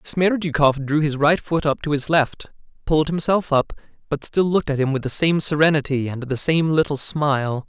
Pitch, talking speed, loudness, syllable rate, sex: 150 Hz, 205 wpm, -20 LUFS, 5.2 syllables/s, male